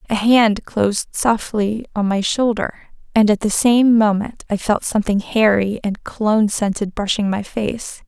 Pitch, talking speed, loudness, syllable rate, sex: 215 Hz, 165 wpm, -18 LUFS, 4.5 syllables/s, female